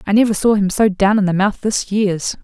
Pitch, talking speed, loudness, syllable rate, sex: 205 Hz, 270 wpm, -16 LUFS, 5.3 syllables/s, female